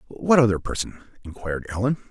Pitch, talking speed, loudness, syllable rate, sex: 110 Hz, 140 wpm, -23 LUFS, 6.8 syllables/s, male